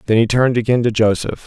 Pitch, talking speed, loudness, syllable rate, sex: 115 Hz, 245 wpm, -16 LUFS, 6.7 syllables/s, male